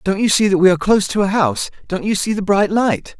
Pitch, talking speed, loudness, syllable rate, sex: 195 Hz, 300 wpm, -16 LUFS, 6.5 syllables/s, male